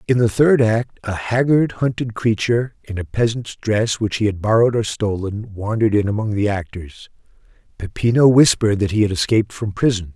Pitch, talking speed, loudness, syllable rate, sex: 110 Hz, 185 wpm, -18 LUFS, 5.4 syllables/s, male